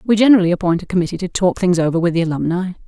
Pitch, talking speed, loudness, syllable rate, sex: 180 Hz, 250 wpm, -16 LUFS, 7.8 syllables/s, female